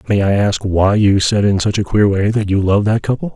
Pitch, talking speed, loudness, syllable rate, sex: 105 Hz, 285 wpm, -14 LUFS, 5.7 syllables/s, male